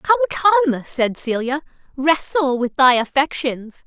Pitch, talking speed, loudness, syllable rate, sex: 285 Hz, 125 wpm, -18 LUFS, 4.0 syllables/s, female